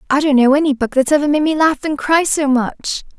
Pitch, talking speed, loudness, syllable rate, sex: 285 Hz, 265 wpm, -15 LUFS, 5.7 syllables/s, female